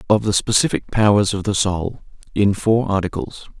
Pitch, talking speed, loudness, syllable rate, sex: 100 Hz, 165 wpm, -19 LUFS, 4.4 syllables/s, male